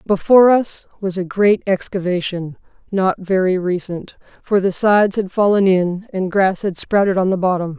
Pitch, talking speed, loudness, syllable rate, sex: 190 Hz, 170 wpm, -17 LUFS, 4.8 syllables/s, female